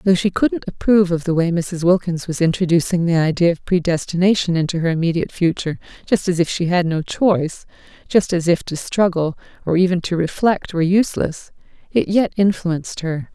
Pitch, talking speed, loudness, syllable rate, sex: 175 Hz, 185 wpm, -18 LUFS, 5.7 syllables/s, female